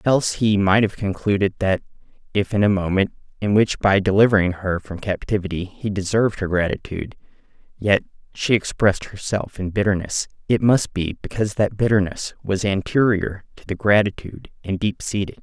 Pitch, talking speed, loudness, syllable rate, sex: 100 Hz, 160 wpm, -21 LUFS, 5.5 syllables/s, male